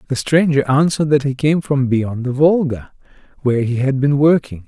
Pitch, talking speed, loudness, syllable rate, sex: 135 Hz, 195 wpm, -16 LUFS, 5.3 syllables/s, male